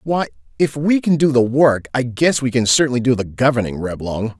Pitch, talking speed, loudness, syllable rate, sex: 125 Hz, 205 wpm, -17 LUFS, 5.4 syllables/s, male